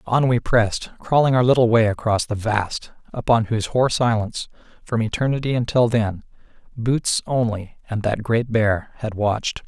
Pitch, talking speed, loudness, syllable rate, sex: 115 Hz, 160 wpm, -20 LUFS, 5.0 syllables/s, male